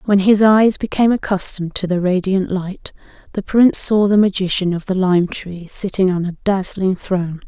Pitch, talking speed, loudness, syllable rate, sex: 190 Hz, 185 wpm, -16 LUFS, 5.1 syllables/s, female